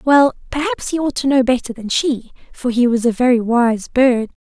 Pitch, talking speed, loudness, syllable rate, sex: 255 Hz, 215 wpm, -17 LUFS, 5.0 syllables/s, female